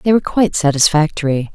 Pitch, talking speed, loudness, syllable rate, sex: 165 Hz, 155 wpm, -15 LUFS, 6.9 syllables/s, female